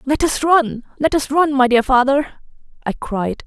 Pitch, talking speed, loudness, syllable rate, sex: 270 Hz, 190 wpm, -17 LUFS, 4.5 syllables/s, female